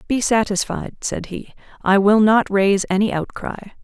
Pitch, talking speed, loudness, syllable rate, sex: 205 Hz, 155 wpm, -18 LUFS, 4.6 syllables/s, female